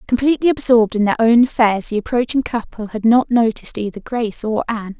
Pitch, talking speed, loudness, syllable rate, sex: 230 Hz, 190 wpm, -17 LUFS, 6.3 syllables/s, female